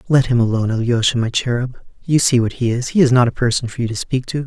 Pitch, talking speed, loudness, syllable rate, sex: 125 Hz, 280 wpm, -17 LUFS, 6.7 syllables/s, male